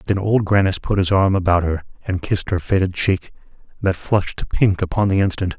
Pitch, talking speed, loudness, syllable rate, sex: 95 Hz, 215 wpm, -19 LUFS, 5.7 syllables/s, male